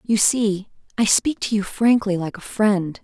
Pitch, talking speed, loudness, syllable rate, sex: 210 Hz, 200 wpm, -20 LUFS, 4.1 syllables/s, female